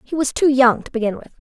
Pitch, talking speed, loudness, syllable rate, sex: 260 Hz, 280 wpm, -17 LUFS, 6.2 syllables/s, female